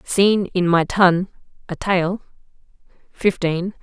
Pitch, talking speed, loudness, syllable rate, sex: 185 Hz, 110 wpm, -19 LUFS, 3.8 syllables/s, female